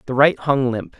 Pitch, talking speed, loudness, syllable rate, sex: 135 Hz, 240 wpm, -18 LUFS, 4.8 syllables/s, male